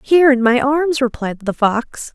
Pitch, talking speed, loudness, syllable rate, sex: 255 Hz, 195 wpm, -16 LUFS, 4.4 syllables/s, female